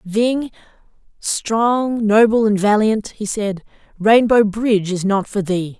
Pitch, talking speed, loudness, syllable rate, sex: 215 Hz, 135 wpm, -17 LUFS, 3.7 syllables/s, female